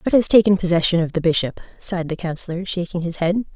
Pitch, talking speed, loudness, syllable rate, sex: 180 Hz, 220 wpm, -20 LUFS, 6.6 syllables/s, female